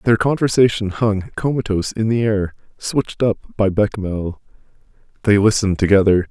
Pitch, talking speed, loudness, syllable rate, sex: 105 Hz, 135 wpm, -18 LUFS, 5.5 syllables/s, male